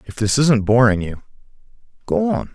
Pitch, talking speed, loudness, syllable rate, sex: 115 Hz, 165 wpm, -17 LUFS, 4.9 syllables/s, male